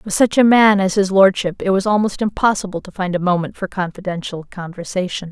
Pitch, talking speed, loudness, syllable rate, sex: 190 Hz, 205 wpm, -17 LUFS, 5.8 syllables/s, female